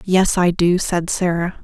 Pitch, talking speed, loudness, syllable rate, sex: 175 Hz, 185 wpm, -17 LUFS, 4.0 syllables/s, female